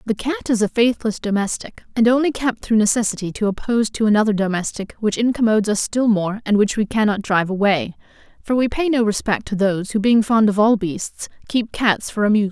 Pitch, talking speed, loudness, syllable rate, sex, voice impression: 215 Hz, 210 wpm, -19 LUFS, 5.9 syllables/s, female, feminine, slightly young, slightly adult-like, slightly thin, tensed, powerful, bright, slightly soft, clear, fluent, slightly cute, slightly cool, intellectual, slightly refreshing, sincere, very calm, reassuring, elegant, slightly sweet, slightly lively, slightly kind, slightly intense